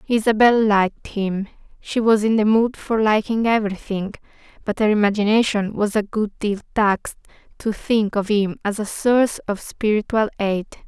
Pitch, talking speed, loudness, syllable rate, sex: 210 Hz, 155 wpm, -20 LUFS, 4.9 syllables/s, female